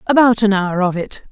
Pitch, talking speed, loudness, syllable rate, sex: 205 Hz, 225 wpm, -15 LUFS, 5.4 syllables/s, female